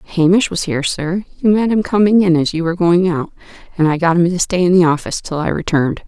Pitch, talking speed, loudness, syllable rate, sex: 175 Hz, 255 wpm, -15 LUFS, 6.3 syllables/s, female